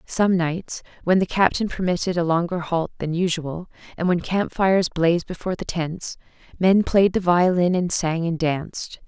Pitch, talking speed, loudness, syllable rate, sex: 175 Hz, 180 wpm, -22 LUFS, 4.8 syllables/s, female